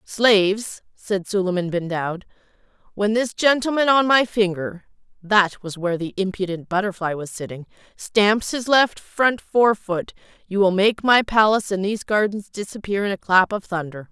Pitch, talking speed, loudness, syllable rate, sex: 200 Hz, 160 wpm, -20 LUFS, 3.9 syllables/s, female